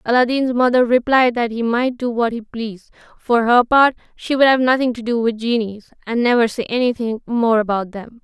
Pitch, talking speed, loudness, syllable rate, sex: 235 Hz, 205 wpm, -17 LUFS, 5.2 syllables/s, female